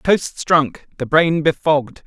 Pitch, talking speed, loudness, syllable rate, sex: 155 Hz, 145 wpm, -17 LUFS, 3.7 syllables/s, male